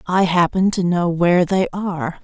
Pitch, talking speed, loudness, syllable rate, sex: 180 Hz, 190 wpm, -18 LUFS, 5.0 syllables/s, female